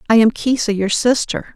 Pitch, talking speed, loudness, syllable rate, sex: 225 Hz, 195 wpm, -16 LUFS, 5.1 syllables/s, female